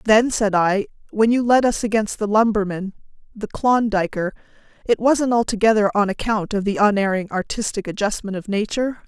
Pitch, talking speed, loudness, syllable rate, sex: 210 Hz, 145 wpm, -20 LUFS, 5.4 syllables/s, female